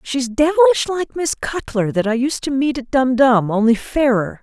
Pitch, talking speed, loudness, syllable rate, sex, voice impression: 260 Hz, 190 wpm, -17 LUFS, 4.6 syllables/s, female, feminine, adult-like, tensed, powerful, slightly hard, clear, fluent, intellectual, calm, slightly friendly, lively, sharp